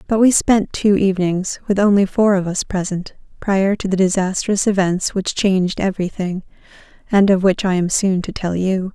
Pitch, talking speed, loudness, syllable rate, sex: 190 Hz, 190 wpm, -17 LUFS, 5.0 syllables/s, female